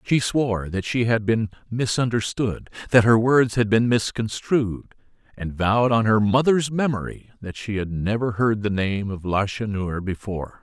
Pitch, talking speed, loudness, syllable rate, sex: 110 Hz, 165 wpm, -22 LUFS, 4.6 syllables/s, male